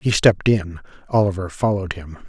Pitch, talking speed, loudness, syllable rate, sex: 95 Hz, 160 wpm, -20 LUFS, 5.9 syllables/s, male